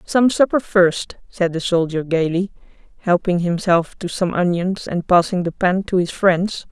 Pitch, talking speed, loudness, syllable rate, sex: 180 Hz, 170 wpm, -18 LUFS, 4.4 syllables/s, female